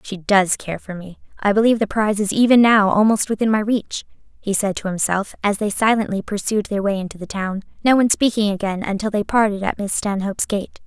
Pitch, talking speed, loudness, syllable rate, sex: 205 Hz, 220 wpm, -19 LUFS, 5.9 syllables/s, female